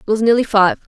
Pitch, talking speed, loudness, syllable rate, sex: 215 Hz, 240 wpm, -15 LUFS, 5.9 syllables/s, female